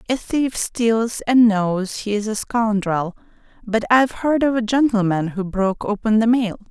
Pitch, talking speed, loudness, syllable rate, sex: 220 Hz, 180 wpm, -19 LUFS, 4.4 syllables/s, female